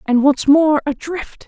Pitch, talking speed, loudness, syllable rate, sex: 295 Hz, 120 wpm, -15 LUFS, 4.6 syllables/s, female